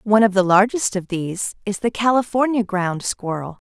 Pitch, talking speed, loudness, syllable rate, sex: 205 Hz, 180 wpm, -20 LUFS, 5.3 syllables/s, female